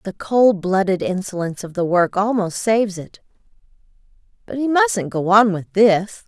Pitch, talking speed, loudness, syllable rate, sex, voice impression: 195 Hz, 165 wpm, -18 LUFS, 4.8 syllables/s, female, very feminine, adult-like, middle-aged, thin, very tensed, slightly powerful, bright, slightly hard, very clear, intellectual, sincere, calm, slightly unique, very elegant, slightly strict